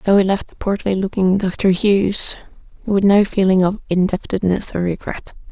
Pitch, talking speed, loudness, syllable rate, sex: 195 Hz, 165 wpm, -17 LUFS, 4.9 syllables/s, female